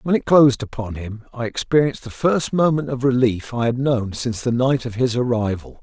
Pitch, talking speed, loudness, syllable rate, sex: 125 Hz, 215 wpm, -20 LUFS, 5.5 syllables/s, male